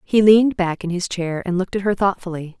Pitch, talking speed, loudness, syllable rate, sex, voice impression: 190 Hz, 255 wpm, -19 LUFS, 6.0 syllables/s, female, feminine, adult-like, bright, clear, fluent, intellectual, friendly, reassuring, elegant, kind, slightly modest